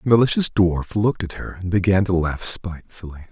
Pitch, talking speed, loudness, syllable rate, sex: 95 Hz, 200 wpm, -20 LUFS, 5.8 syllables/s, male